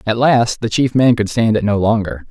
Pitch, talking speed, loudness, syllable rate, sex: 110 Hz, 260 wpm, -15 LUFS, 5.1 syllables/s, male